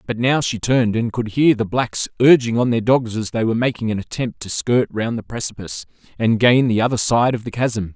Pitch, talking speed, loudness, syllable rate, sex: 115 Hz, 240 wpm, -18 LUFS, 5.5 syllables/s, male